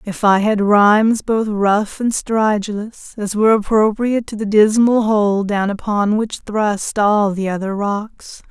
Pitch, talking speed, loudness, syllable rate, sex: 210 Hz, 160 wpm, -16 LUFS, 4.0 syllables/s, female